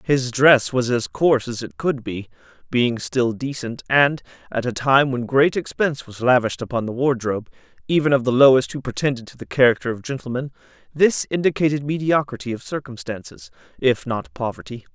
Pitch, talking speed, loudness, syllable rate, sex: 130 Hz, 175 wpm, -20 LUFS, 5.5 syllables/s, male